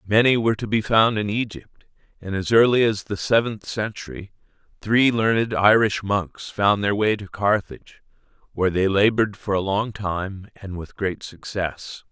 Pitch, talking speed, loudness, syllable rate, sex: 105 Hz, 170 wpm, -21 LUFS, 4.6 syllables/s, male